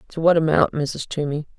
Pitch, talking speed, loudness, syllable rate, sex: 155 Hz, 190 wpm, -21 LUFS, 5.4 syllables/s, female